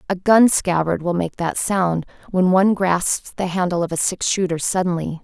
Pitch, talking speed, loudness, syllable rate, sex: 180 Hz, 195 wpm, -19 LUFS, 4.8 syllables/s, female